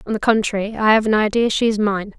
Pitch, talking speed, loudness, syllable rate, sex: 215 Hz, 275 wpm, -18 LUFS, 6.4 syllables/s, female